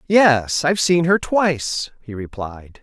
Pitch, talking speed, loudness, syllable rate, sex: 145 Hz, 150 wpm, -18 LUFS, 3.9 syllables/s, male